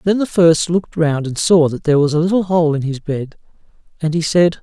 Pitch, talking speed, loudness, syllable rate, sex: 165 Hz, 245 wpm, -16 LUFS, 5.7 syllables/s, male